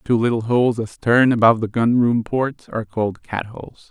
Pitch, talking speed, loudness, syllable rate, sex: 115 Hz, 200 wpm, -19 LUFS, 5.5 syllables/s, male